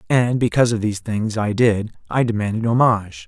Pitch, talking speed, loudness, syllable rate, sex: 110 Hz, 185 wpm, -19 LUFS, 5.9 syllables/s, male